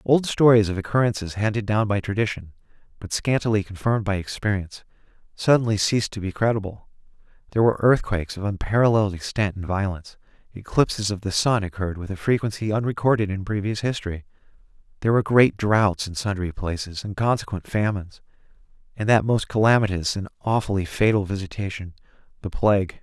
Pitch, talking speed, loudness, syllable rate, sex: 105 Hz, 150 wpm, -23 LUFS, 6.3 syllables/s, male